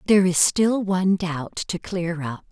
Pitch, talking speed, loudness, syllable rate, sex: 180 Hz, 190 wpm, -22 LUFS, 4.4 syllables/s, female